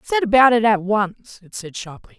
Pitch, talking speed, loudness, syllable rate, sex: 185 Hz, 220 wpm, -16 LUFS, 4.9 syllables/s, male